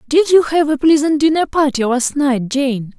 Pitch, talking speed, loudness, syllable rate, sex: 285 Hz, 200 wpm, -15 LUFS, 4.6 syllables/s, female